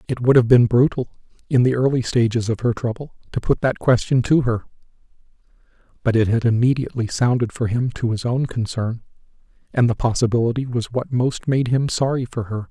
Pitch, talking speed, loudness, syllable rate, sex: 120 Hz, 190 wpm, -20 LUFS, 5.6 syllables/s, male